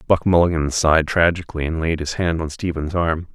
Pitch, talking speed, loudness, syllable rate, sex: 80 Hz, 195 wpm, -19 LUFS, 5.7 syllables/s, male